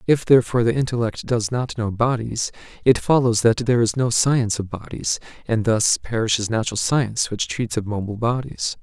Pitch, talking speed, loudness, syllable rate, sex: 115 Hz, 185 wpm, -21 LUFS, 5.6 syllables/s, male